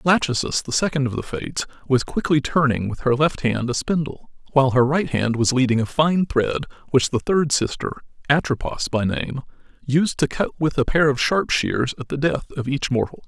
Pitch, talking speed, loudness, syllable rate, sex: 135 Hz, 210 wpm, -21 LUFS, 5.2 syllables/s, male